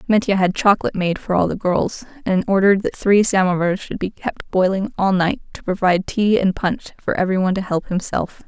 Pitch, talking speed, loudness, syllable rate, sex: 190 Hz, 205 wpm, -19 LUFS, 5.6 syllables/s, female